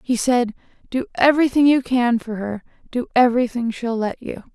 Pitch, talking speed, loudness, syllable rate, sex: 240 Hz, 170 wpm, -19 LUFS, 5.3 syllables/s, female